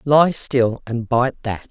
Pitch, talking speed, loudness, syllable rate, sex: 125 Hz, 175 wpm, -19 LUFS, 3.2 syllables/s, female